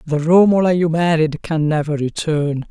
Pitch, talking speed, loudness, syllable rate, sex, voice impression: 160 Hz, 155 wpm, -16 LUFS, 4.6 syllables/s, male, masculine, adult-like, powerful, slightly soft, muffled, slightly halting, slightly refreshing, calm, friendly, slightly wild, lively, slightly kind, slightly modest